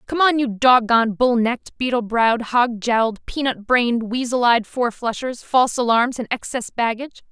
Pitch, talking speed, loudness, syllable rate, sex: 240 Hz, 130 wpm, -19 LUFS, 5.2 syllables/s, female